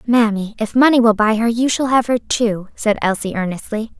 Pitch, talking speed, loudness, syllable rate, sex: 225 Hz, 210 wpm, -17 LUFS, 5.2 syllables/s, female